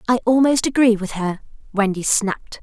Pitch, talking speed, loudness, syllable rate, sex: 220 Hz, 160 wpm, -18 LUFS, 5.2 syllables/s, female